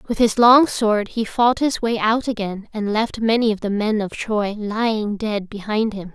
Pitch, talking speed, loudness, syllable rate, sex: 215 Hz, 215 wpm, -19 LUFS, 4.4 syllables/s, female